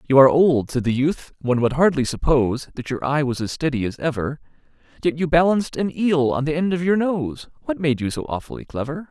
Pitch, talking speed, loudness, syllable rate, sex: 145 Hz, 230 wpm, -21 LUFS, 6.0 syllables/s, male